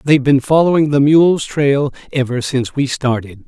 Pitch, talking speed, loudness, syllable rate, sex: 140 Hz, 175 wpm, -14 LUFS, 5.1 syllables/s, male